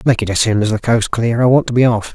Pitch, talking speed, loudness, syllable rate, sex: 115 Hz, 335 wpm, -14 LUFS, 6.3 syllables/s, male